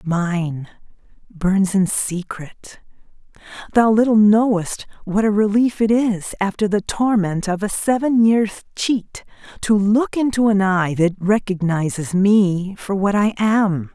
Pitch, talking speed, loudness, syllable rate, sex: 200 Hz, 140 wpm, -18 LUFS, 3.7 syllables/s, female